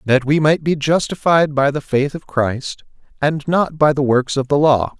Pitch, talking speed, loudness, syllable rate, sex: 145 Hz, 215 wpm, -17 LUFS, 4.4 syllables/s, male